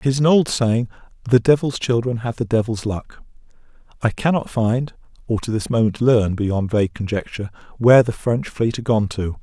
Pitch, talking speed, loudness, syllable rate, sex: 115 Hz, 180 wpm, -19 LUFS, 5.4 syllables/s, male